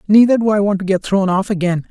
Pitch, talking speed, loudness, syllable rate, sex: 200 Hz, 285 wpm, -15 LUFS, 6.4 syllables/s, male